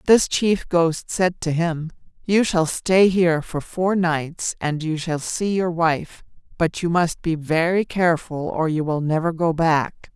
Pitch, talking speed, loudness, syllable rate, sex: 170 Hz, 185 wpm, -21 LUFS, 3.9 syllables/s, female